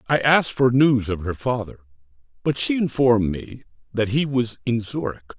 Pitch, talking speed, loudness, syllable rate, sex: 120 Hz, 180 wpm, -21 LUFS, 5.2 syllables/s, male